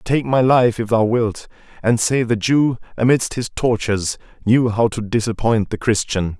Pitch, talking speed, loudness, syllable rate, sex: 115 Hz, 180 wpm, -18 LUFS, 4.6 syllables/s, male